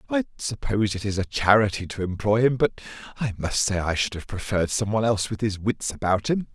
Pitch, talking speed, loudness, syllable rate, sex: 105 Hz, 220 wpm, -24 LUFS, 6.2 syllables/s, male